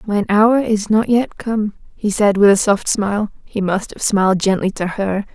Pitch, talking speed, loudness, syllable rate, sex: 205 Hz, 215 wpm, -17 LUFS, 3.4 syllables/s, female